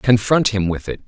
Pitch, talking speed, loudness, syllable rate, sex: 115 Hz, 225 wpm, -18 LUFS, 5.0 syllables/s, male